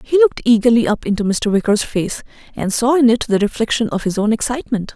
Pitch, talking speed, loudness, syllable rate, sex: 230 Hz, 220 wpm, -16 LUFS, 6.3 syllables/s, female